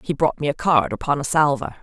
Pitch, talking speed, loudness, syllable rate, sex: 140 Hz, 265 wpm, -20 LUFS, 5.9 syllables/s, female